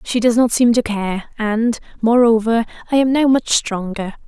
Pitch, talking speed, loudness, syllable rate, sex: 230 Hz, 180 wpm, -17 LUFS, 4.6 syllables/s, female